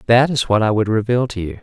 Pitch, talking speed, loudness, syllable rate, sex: 115 Hz, 295 wpm, -17 LUFS, 6.2 syllables/s, male